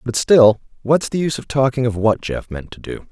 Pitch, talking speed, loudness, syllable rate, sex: 125 Hz, 230 wpm, -17 LUFS, 5.4 syllables/s, male